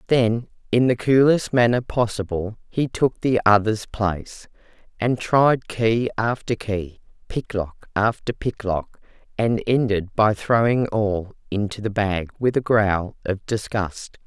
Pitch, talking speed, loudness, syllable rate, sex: 110 Hz, 135 wpm, -22 LUFS, 3.9 syllables/s, female